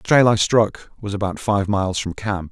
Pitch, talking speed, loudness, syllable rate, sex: 100 Hz, 240 wpm, -20 LUFS, 4.9 syllables/s, male